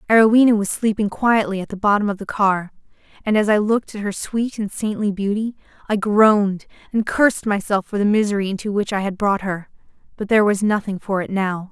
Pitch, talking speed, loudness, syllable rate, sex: 205 Hz, 210 wpm, -19 LUFS, 5.8 syllables/s, female